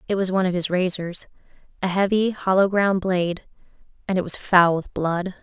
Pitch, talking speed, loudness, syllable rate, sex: 185 Hz, 165 wpm, -21 LUFS, 5.4 syllables/s, female